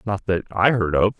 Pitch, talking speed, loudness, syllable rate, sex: 100 Hz, 250 wpm, -20 LUFS, 5.3 syllables/s, male